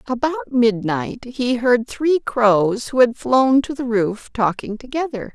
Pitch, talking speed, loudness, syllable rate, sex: 240 Hz, 155 wpm, -19 LUFS, 3.8 syllables/s, female